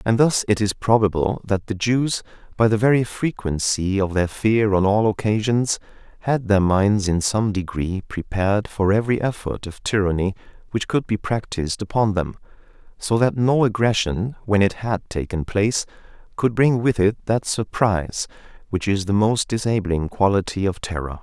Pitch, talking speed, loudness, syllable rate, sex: 105 Hz, 165 wpm, -21 LUFS, 4.8 syllables/s, male